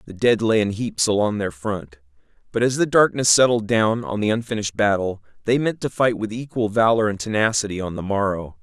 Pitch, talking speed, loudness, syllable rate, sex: 110 Hz, 210 wpm, -20 LUFS, 5.6 syllables/s, male